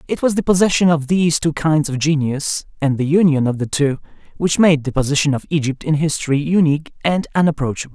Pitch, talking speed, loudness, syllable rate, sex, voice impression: 155 Hz, 205 wpm, -17 LUFS, 6.0 syllables/s, male, masculine, adult-like, tensed, powerful, slightly bright, clear, fluent, intellectual, refreshing, friendly, lively